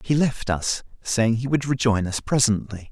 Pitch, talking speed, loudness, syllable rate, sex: 120 Hz, 185 wpm, -22 LUFS, 4.6 syllables/s, male